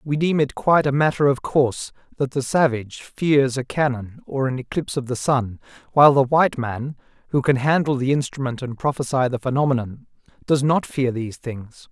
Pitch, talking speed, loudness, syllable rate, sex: 135 Hz, 190 wpm, -21 LUFS, 5.5 syllables/s, male